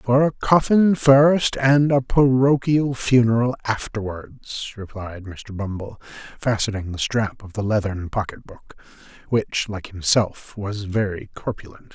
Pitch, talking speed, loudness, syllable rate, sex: 115 Hz, 130 wpm, -20 LUFS, 4.0 syllables/s, male